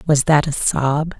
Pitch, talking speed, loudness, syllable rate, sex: 150 Hz, 200 wpm, -17 LUFS, 3.9 syllables/s, female